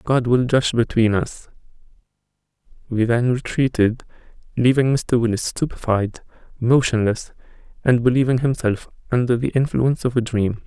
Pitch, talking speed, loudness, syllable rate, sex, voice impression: 120 Hz, 125 wpm, -20 LUFS, 5.1 syllables/s, male, very masculine, slightly middle-aged, thick, relaxed, weak, very dark, very soft, very muffled, fluent, slightly raspy, cool, intellectual, slightly refreshing, very sincere, very calm, mature, friendly, reassuring, very unique, very elegant, slightly wild, sweet, slightly lively, very kind, very modest